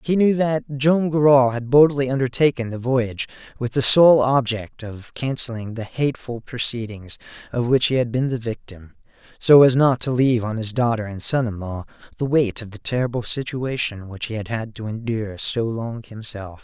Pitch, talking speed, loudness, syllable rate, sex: 120 Hz, 190 wpm, -20 LUFS, 5.0 syllables/s, male